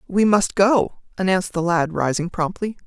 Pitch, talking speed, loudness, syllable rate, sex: 185 Hz, 165 wpm, -20 LUFS, 4.8 syllables/s, female